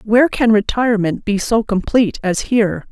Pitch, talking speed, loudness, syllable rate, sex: 215 Hz, 165 wpm, -16 LUFS, 5.4 syllables/s, female